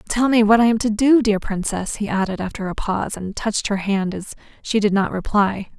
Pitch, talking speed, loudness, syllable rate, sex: 210 Hz, 240 wpm, -19 LUFS, 5.5 syllables/s, female